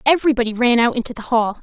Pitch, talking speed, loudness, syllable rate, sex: 240 Hz, 220 wpm, -17 LUFS, 7.3 syllables/s, female